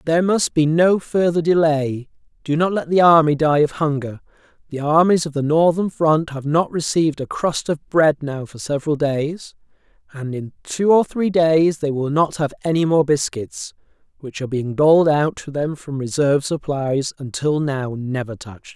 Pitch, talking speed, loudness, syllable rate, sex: 150 Hz, 180 wpm, -19 LUFS, 4.8 syllables/s, male